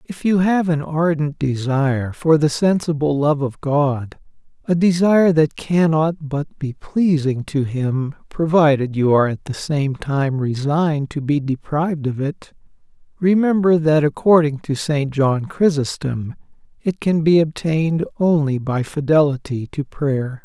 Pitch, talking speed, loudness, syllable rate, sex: 150 Hz, 145 wpm, -18 LUFS, 4.2 syllables/s, male